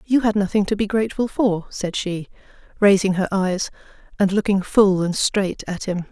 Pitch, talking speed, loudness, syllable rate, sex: 195 Hz, 185 wpm, -20 LUFS, 4.9 syllables/s, female